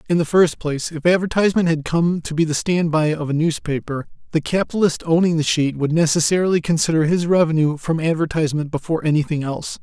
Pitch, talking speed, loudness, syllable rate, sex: 160 Hz, 190 wpm, -19 LUFS, 6.3 syllables/s, male